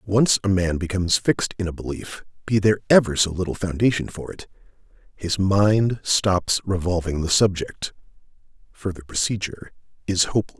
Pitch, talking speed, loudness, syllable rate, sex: 95 Hz, 145 wpm, -22 LUFS, 5.3 syllables/s, male